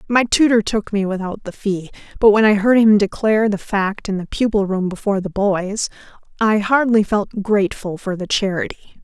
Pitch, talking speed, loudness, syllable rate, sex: 205 Hz, 195 wpm, -18 LUFS, 5.3 syllables/s, female